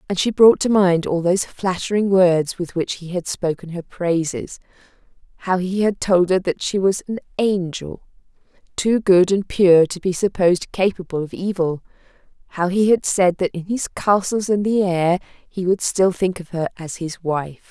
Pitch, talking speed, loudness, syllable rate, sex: 185 Hz, 185 wpm, -19 LUFS, 4.6 syllables/s, female